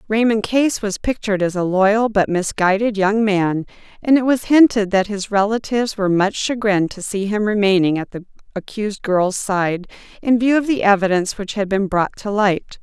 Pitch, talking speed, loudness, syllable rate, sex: 205 Hz, 190 wpm, -18 LUFS, 5.2 syllables/s, female